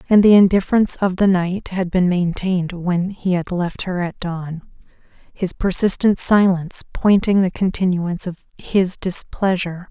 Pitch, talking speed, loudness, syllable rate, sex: 185 Hz, 150 wpm, -18 LUFS, 4.7 syllables/s, female